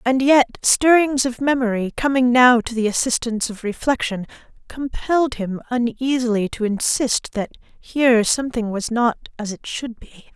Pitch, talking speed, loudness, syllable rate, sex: 240 Hz, 150 wpm, -19 LUFS, 4.7 syllables/s, female